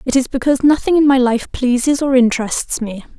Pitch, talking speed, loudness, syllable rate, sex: 260 Hz, 205 wpm, -15 LUFS, 5.7 syllables/s, female